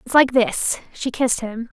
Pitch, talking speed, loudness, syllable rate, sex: 240 Hz, 200 wpm, -20 LUFS, 4.8 syllables/s, female